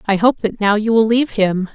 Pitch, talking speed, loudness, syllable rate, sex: 215 Hz, 275 wpm, -16 LUFS, 5.6 syllables/s, female